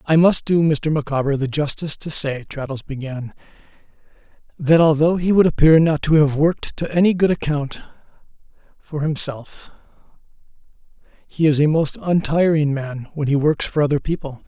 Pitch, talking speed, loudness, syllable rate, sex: 150 Hz, 160 wpm, -18 LUFS, 5.2 syllables/s, male